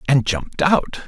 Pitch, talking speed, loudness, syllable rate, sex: 135 Hz, 165 wpm, -19 LUFS, 5.6 syllables/s, male